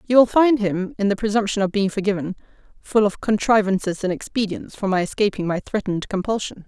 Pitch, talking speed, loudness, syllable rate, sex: 205 Hz, 190 wpm, -21 LUFS, 4.9 syllables/s, female